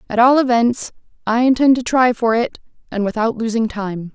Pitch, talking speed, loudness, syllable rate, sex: 235 Hz, 190 wpm, -17 LUFS, 5.1 syllables/s, female